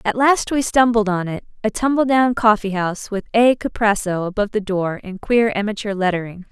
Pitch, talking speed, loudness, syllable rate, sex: 210 Hz, 185 wpm, -18 LUFS, 5.4 syllables/s, female